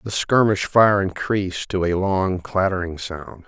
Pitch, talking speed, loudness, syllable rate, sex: 95 Hz, 155 wpm, -20 LUFS, 4.2 syllables/s, male